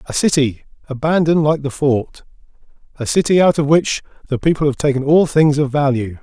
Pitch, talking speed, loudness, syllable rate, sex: 145 Hz, 185 wpm, -16 LUFS, 5.6 syllables/s, male